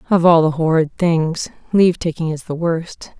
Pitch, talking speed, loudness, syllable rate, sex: 165 Hz, 170 wpm, -17 LUFS, 4.4 syllables/s, female